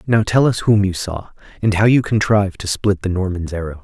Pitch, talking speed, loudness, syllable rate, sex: 100 Hz, 235 wpm, -17 LUFS, 5.6 syllables/s, male